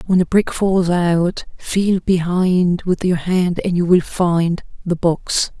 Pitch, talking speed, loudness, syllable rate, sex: 180 Hz, 170 wpm, -17 LUFS, 3.4 syllables/s, female